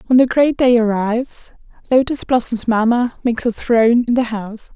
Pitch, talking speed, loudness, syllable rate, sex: 235 Hz, 175 wpm, -16 LUFS, 5.3 syllables/s, female